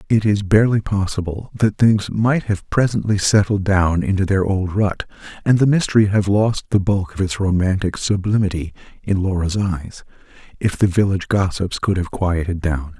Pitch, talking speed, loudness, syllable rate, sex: 100 Hz, 170 wpm, -18 LUFS, 5.0 syllables/s, male